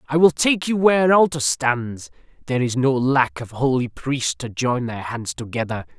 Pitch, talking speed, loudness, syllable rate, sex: 130 Hz, 200 wpm, -20 LUFS, 4.8 syllables/s, male